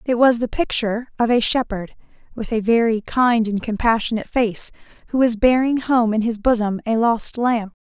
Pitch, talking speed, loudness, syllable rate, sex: 230 Hz, 185 wpm, -19 LUFS, 5.0 syllables/s, female